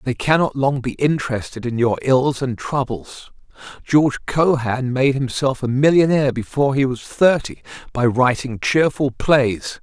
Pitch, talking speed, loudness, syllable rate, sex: 130 Hz, 145 wpm, -18 LUFS, 4.6 syllables/s, male